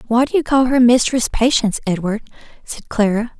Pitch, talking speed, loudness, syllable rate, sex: 235 Hz, 175 wpm, -16 LUFS, 5.6 syllables/s, female